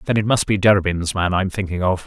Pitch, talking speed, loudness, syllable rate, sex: 95 Hz, 290 wpm, -19 LUFS, 6.4 syllables/s, male